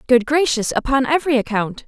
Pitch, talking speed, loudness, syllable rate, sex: 260 Hz, 160 wpm, -18 LUFS, 6.1 syllables/s, female